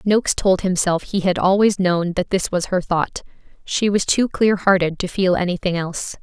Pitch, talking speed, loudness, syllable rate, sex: 185 Hz, 200 wpm, -19 LUFS, 5.0 syllables/s, female